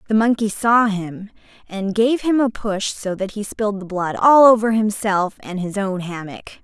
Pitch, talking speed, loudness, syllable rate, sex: 205 Hz, 200 wpm, -18 LUFS, 4.6 syllables/s, female